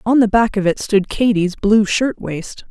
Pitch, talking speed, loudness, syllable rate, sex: 210 Hz, 200 wpm, -16 LUFS, 4.3 syllables/s, female